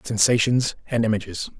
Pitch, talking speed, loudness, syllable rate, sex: 110 Hz, 115 wpm, -21 LUFS, 5.2 syllables/s, male